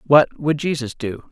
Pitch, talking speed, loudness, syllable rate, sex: 135 Hz, 180 wpm, -20 LUFS, 4.2 syllables/s, male